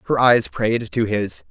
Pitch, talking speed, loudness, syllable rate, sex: 110 Hz, 200 wpm, -19 LUFS, 3.9 syllables/s, male